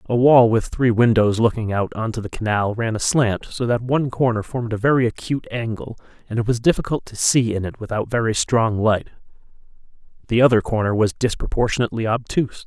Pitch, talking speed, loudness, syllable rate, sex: 115 Hz, 190 wpm, -20 LUFS, 5.9 syllables/s, male